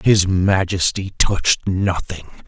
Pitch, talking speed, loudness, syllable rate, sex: 95 Hz, 95 wpm, -18 LUFS, 3.8 syllables/s, male